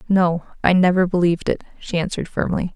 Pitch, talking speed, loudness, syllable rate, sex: 175 Hz, 175 wpm, -20 LUFS, 6.2 syllables/s, female